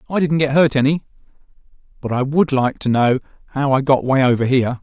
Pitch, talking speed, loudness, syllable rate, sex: 135 Hz, 210 wpm, -17 LUFS, 6.0 syllables/s, male